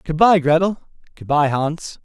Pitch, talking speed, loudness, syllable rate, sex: 160 Hz, 120 wpm, -17 LUFS, 4.1 syllables/s, male